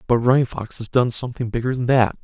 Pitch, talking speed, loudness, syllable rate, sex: 120 Hz, 240 wpm, -20 LUFS, 6.3 syllables/s, male